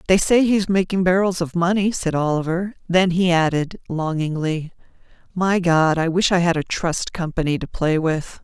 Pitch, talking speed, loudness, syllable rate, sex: 175 Hz, 180 wpm, -20 LUFS, 4.7 syllables/s, female